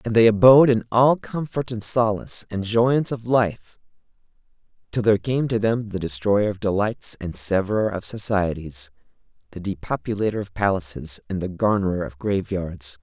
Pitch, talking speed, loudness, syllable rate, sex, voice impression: 105 Hz, 155 wpm, -22 LUFS, 5.1 syllables/s, male, masculine, slightly young, slightly adult-like, thick, slightly tensed, slightly weak, slightly bright, soft, slightly clear, fluent, slightly raspy, cool, very intellectual, very refreshing, sincere, very calm, friendly, very reassuring, unique, very elegant, slightly wild, sweet, slightly lively, very kind, slightly modest